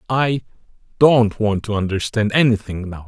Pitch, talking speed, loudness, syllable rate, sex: 110 Hz, 135 wpm, -18 LUFS, 4.7 syllables/s, male